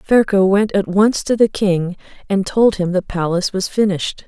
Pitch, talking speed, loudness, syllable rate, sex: 195 Hz, 195 wpm, -16 LUFS, 4.9 syllables/s, female